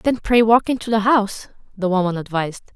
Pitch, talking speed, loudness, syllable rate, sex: 210 Hz, 195 wpm, -18 LUFS, 6.0 syllables/s, female